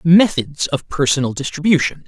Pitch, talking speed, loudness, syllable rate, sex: 150 Hz, 115 wpm, -17 LUFS, 5.1 syllables/s, male